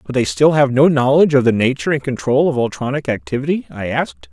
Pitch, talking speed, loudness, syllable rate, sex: 130 Hz, 220 wpm, -16 LUFS, 6.5 syllables/s, male